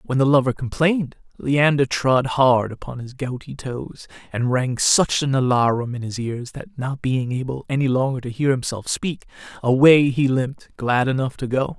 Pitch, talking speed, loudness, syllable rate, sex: 130 Hz, 185 wpm, -20 LUFS, 4.7 syllables/s, male